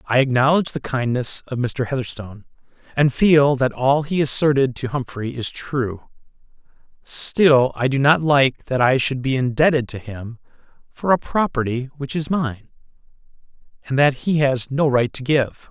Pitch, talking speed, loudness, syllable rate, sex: 135 Hz, 165 wpm, -19 LUFS, 4.5 syllables/s, male